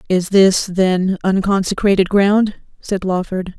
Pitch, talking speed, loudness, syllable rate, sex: 190 Hz, 115 wpm, -16 LUFS, 3.8 syllables/s, female